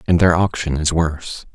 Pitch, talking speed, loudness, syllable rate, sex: 80 Hz, 195 wpm, -18 LUFS, 5.3 syllables/s, male